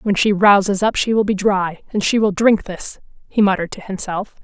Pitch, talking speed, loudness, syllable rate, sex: 200 Hz, 230 wpm, -17 LUFS, 5.4 syllables/s, female